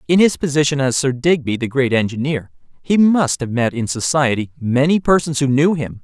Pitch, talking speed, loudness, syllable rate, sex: 140 Hz, 200 wpm, -17 LUFS, 5.3 syllables/s, male